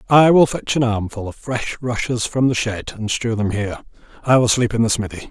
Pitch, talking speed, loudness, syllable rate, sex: 115 Hz, 240 wpm, -19 LUFS, 5.4 syllables/s, male